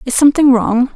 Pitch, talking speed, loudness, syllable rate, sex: 260 Hz, 190 wpm, -12 LUFS, 6.1 syllables/s, female